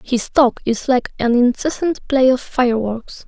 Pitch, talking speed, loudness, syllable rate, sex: 250 Hz, 165 wpm, -17 LUFS, 4.3 syllables/s, female